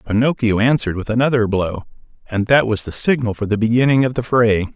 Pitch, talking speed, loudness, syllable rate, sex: 115 Hz, 200 wpm, -17 LUFS, 6.0 syllables/s, male